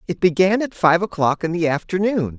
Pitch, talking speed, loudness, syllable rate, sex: 175 Hz, 200 wpm, -19 LUFS, 5.4 syllables/s, male